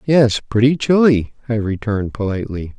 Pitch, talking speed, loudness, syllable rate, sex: 115 Hz, 130 wpm, -17 LUFS, 5.3 syllables/s, male